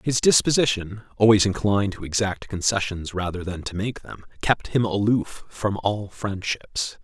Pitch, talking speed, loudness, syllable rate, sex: 100 Hz, 155 wpm, -23 LUFS, 2.4 syllables/s, male